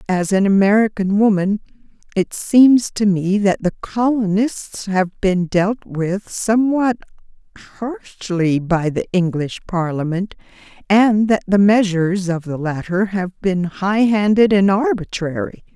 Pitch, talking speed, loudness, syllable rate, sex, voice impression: 195 Hz, 130 wpm, -17 LUFS, 4.0 syllables/s, female, feminine, adult-like, tensed, powerful, slightly hard, clear, halting, lively, slightly strict, intense, sharp